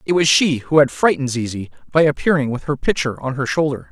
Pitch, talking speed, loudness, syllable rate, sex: 140 Hz, 230 wpm, -18 LUFS, 6.1 syllables/s, male